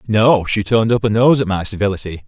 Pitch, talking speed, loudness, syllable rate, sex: 105 Hz, 235 wpm, -15 LUFS, 6.1 syllables/s, male